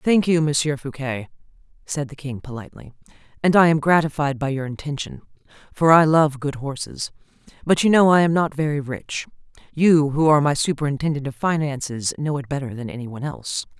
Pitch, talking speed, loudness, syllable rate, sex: 145 Hz, 185 wpm, -21 LUFS, 5.8 syllables/s, female